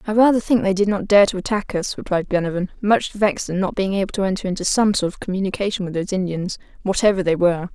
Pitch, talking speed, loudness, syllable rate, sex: 195 Hz, 240 wpm, -20 LUFS, 6.8 syllables/s, female